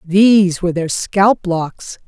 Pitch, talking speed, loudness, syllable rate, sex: 185 Hz, 145 wpm, -14 LUFS, 3.7 syllables/s, female